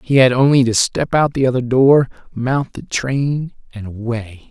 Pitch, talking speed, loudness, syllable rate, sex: 125 Hz, 185 wpm, -16 LUFS, 4.2 syllables/s, male